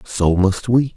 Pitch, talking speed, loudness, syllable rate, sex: 100 Hz, 190 wpm, -17 LUFS, 3.7 syllables/s, male